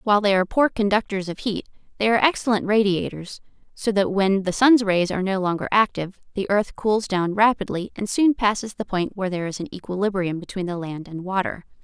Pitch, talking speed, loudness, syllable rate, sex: 200 Hz, 210 wpm, -22 LUFS, 6.0 syllables/s, female